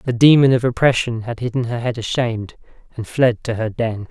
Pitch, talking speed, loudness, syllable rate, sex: 120 Hz, 205 wpm, -18 LUFS, 5.6 syllables/s, male